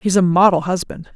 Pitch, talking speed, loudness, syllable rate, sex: 180 Hz, 205 wpm, -16 LUFS, 5.4 syllables/s, female